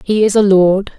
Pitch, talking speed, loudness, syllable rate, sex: 200 Hz, 245 wpm, -12 LUFS, 4.8 syllables/s, female